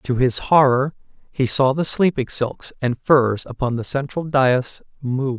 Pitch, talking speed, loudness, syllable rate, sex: 130 Hz, 165 wpm, -19 LUFS, 4.0 syllables/s, male